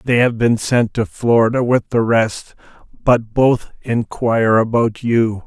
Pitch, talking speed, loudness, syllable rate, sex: 115 Hz, 155 wpm, -16 LUFS, 3.9 syllables/s, male